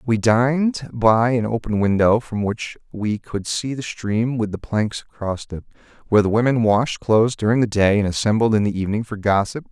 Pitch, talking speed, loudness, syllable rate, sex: 110 Hz, 205 wpm, -20 LUFS, 5.3 syllables/s, male